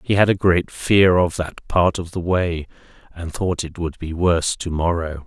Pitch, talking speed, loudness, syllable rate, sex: 85 Hz, 215 wpm, -20 LUFS, 4.5 syllables/s, male